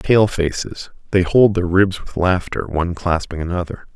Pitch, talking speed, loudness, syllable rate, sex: 90 Hz, 150 wpm, -18 LUFS, 4.9 syllables/s, male